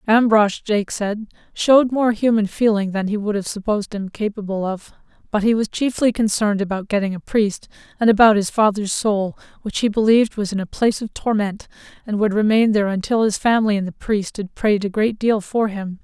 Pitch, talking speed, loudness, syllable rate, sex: 210 Hz, 205 wpm, -19 LUFS, 5.5 syllables/s, female